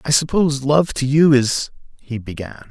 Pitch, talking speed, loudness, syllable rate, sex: 135 Hz, 175 wpm, -17 LUFS, 4.9 syllables/s, male